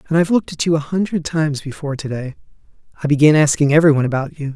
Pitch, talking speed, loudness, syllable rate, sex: 150 Hz, 235 wpm, -17 LUFS, 8.2 syllables/s, male